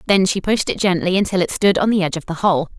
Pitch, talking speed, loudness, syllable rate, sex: 185 Hz, 300 wpm, -18 LUFS, 6.7 syllables/s, female